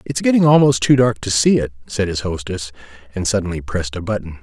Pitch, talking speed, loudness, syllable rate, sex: 100 Hz, 215 wpm, -17 LUFS, 6.2 syllables/s, male